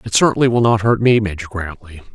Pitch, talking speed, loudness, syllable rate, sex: 105 Hz, 225 wpm, -16 LUFS, 6.2 syllables/s, male